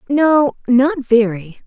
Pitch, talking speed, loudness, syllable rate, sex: 260 Hz, 110 wpm, -15 LUFS, 3.0 syllables/s, female